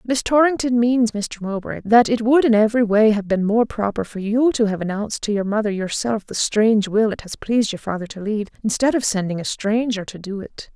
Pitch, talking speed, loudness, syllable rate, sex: 220 Hz, 235 wpm, -19 LUFS, 5.7 syllables/s, female